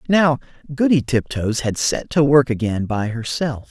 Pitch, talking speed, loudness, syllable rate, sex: 130 Hz, 160 wpm, -19 LUFS, 4.4 syllables/s, male